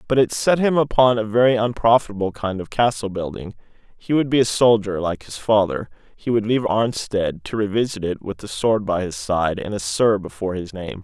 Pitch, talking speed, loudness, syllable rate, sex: 105 Hz, 210 wpm, -20 LUFS, 5.4 syllables/s, male